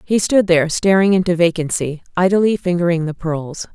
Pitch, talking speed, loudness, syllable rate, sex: 175 Hz, 160 wpm, -16 LUFS, 5.2 syllables/s, female